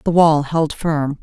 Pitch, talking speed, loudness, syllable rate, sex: 155 Hz, 195 wpm, -17 LUFS, 3.6 syllables/s, female